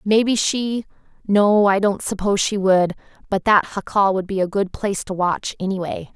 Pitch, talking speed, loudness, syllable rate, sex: 200 Hz, 175 wpm, -19 LUFS, 5.0 syllables/s, female